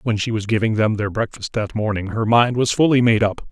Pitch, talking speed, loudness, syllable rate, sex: 110 Hz, 255 wpm, -19 LUFS, 5.5 syllables/s, male